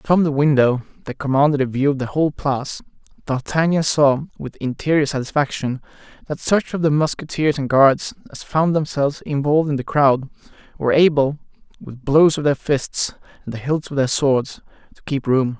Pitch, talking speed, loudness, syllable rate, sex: 140 Hz, 175 wpm, -19 LUFS, 5.2 syllables/s, male